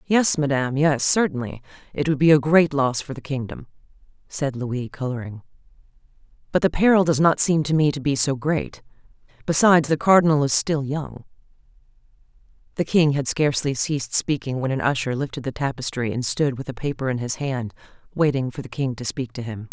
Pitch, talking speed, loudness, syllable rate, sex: 140 Hz, 190 wpm, -21 LUFS, 5.6 syllables/s, female